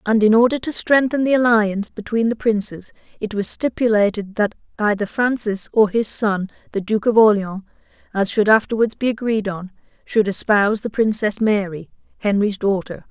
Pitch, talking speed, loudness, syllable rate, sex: 215 Hz, 165 wpm, -19 LUFS, 5.1 syllables/s, female